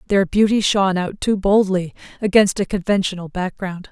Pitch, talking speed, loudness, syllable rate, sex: 195 Hz, 155 wpm, -18 LUFS, 5.2 syllables/s, female